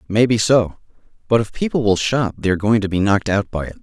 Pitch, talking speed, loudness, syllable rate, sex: 110 Hz, 235 wpm, -18 LUFS, 6.5 syllables/s, male